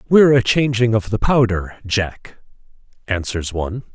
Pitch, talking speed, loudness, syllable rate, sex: 110 Hz, 135 wpm, -18 LUFS, 4.7 syllables/s, male